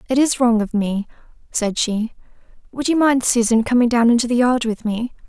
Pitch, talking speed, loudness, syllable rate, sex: 235 Hz, 205 wpm, -18 LUFS, 5.3 syllables/s, female